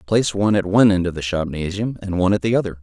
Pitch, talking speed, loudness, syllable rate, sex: 100 Hz, 275 wpm, -19 LUFS, 7.7 syllables/s, male